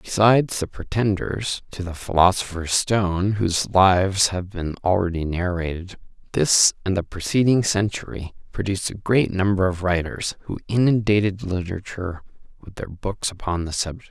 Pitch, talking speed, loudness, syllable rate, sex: 95 Hz, 140 wpm, -21 LUFS, 5.0 syllables/s, male